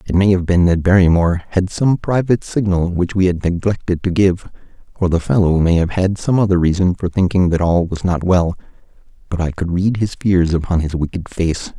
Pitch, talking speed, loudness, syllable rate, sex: 90 Hz, 215 wpm, -16 LUFS, 5.5 syllables/s, male